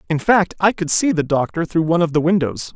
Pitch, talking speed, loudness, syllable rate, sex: 170 Hz, 260 wpm, -17 LUFS, 6.0 syllables/s, male